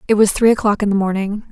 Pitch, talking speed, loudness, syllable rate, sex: 205 Hz, 275 wpm, -16 LUFS, 6.7 syllables/s, female